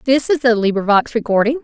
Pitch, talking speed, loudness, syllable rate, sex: 240 Hz, 185 wpm, -15 LUFS, 6.2 syllables/s, female